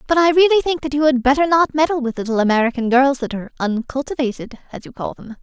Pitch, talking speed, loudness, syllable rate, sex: 270 Hz, 230 wpm, -17 LUFS, 6.6 syllables/s, female